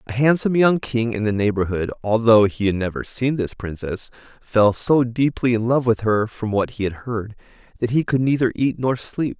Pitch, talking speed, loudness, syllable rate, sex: 115 Hz, 210 wpm, -20 LUFS, 5.0 syllables/s, male